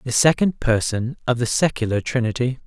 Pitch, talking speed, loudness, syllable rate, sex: 125 Hz, 160 wpm, -20 LUFS, 5.4 syllables/s, male